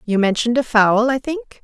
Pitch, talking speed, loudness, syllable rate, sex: 235 Hz, 220 wpm, -17 LUFS, 5.2 syllables/s, female